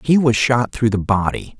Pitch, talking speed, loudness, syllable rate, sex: 120 Hz, 225 wpm, -17 LUFS, 4.7 syllables/s, male